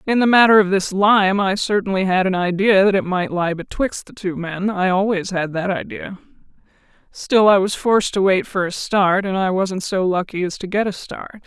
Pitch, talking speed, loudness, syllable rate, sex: 195 Hz, 225 wpm, -18 LUFS, 5.0 syllables/s, female